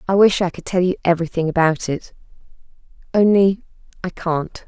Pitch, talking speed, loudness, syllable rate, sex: 180 Hz, 140 wpm, -18 LUFS, 5.6 syllables/s, female